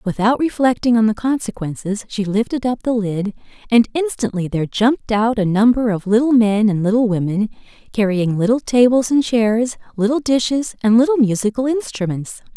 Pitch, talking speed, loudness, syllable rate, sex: 225 Hz, 160 wpm, -17 LUFS, 5.3 syllables/s, female